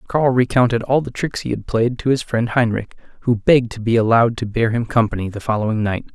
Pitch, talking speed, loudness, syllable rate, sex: 115 Hz, 235 wpm, -18 LUFS, 6.1 syllables/s, male